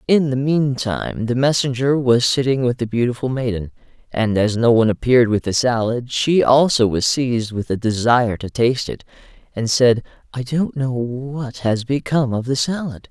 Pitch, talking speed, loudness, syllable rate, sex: 125 Hz, 185 wpm, -18 LUFS, 5.1 syllables/s, male